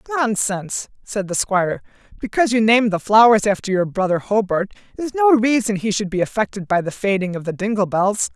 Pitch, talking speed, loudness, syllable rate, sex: 210 Hz, 195 wpm, -19 LUFS, 5.7 syllables/s, female